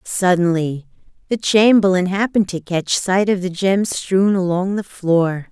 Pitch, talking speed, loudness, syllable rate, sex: 185 Hz, 150 wpm, -17 LUFS, 4.2 syllables/s, female